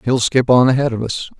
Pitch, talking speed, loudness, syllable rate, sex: 125 Hz, 260 wpm, -15 LUFS, 5.7 syllables/s, male